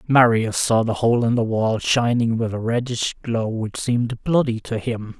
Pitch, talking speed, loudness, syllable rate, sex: 115 Hz, 195 wpm, -20 LUFS, 4.4 syllables/s, male